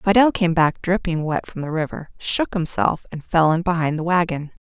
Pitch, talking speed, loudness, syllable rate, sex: 170 Hz, 205 wpm, -20 LUFS, 5.0 syllables/s, female